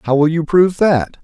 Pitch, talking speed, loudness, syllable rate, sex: 160 Hz, 245 wpm, -14 LUFS, 5.1 syllables/s, male